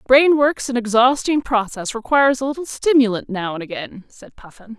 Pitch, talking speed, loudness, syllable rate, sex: 240 Hz, 175 wpm, -18 LUFS, 5.2 syllables/s, female